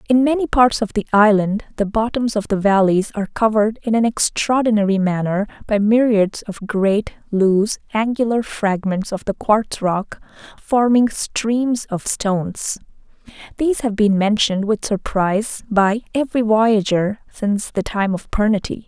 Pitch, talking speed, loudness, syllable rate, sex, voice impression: 215 Hz, 145 wpm, -18 LUFS, 4.6 syllables/s, female, feminine, adult-like, slightly fluent, slightly cute, slightly calm, slightly friendly